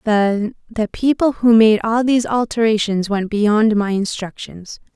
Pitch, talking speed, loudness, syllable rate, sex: 215 Hz, 135 wpm, -16 LUFS, 4.2 syllables/s, female